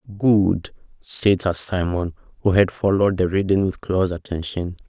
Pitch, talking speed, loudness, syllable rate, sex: 95 Hz, 150 wpm, -21 LUFS, 5.0 syllables/s, male